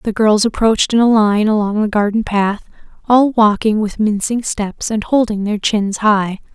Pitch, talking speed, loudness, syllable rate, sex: 215 Hz, 185 wpm, -15 LUFS, 4.5 syllables/s, female